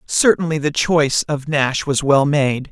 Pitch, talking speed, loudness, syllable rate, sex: 145 Hz, 175 wpm, -17 LUFS, 4.3 syllables/s, male